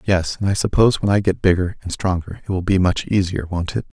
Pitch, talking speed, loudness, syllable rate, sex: 95 Hz, 255 wpm, -19 LUFS, 6.1 syllables/s, male